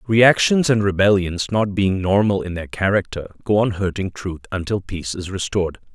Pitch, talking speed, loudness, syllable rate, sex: 95 Hz, 170 wpm, -19 LUFS, 5.1 syllables/s, male